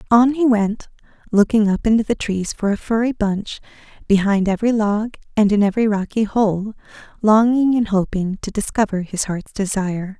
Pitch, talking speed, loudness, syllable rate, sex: 210 Hz, 165 wpm, -18 LUFS, 5.1 syllables/s, female